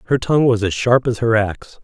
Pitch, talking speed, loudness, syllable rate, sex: 115 Hz, 260 wpm, -17 LUFS, 6.1 syllables/s, male